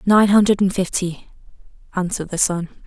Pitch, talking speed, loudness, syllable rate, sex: 190 Hz, 145 wpm, -19 LUFS, 5.6 syllables/s, female